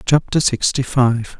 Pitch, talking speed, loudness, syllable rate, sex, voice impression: 130 Hz, 130 wpm, -17 LUFS, 3.9 syllables/s, male, masculine, slightly gender-neutral, slightly young, slightly adult-like, slightly thin, relaxed, slightly weak, slightly bright, slightly soft, slightly clear, fluent, slightly raspy, slightly cool, intellectual, slightly refreshing, very sincere, slightly calm, slightly friendly, reassuring, unique, slightly elegant, sweet, very kind, modest, slightly light